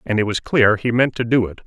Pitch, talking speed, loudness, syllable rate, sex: 115 Hz, 325 wpm, -18 LUFS, 5.9 syllables/s, male